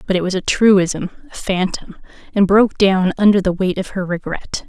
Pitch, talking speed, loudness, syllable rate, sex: 190 Hz, 205 wpm, -16 LUFS, 5.0 syllables/s, female